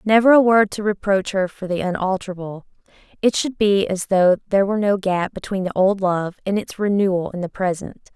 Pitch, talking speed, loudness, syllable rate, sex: 195 Hz, 205 wpm, -19 LUFS, 5.6 syllables/s, female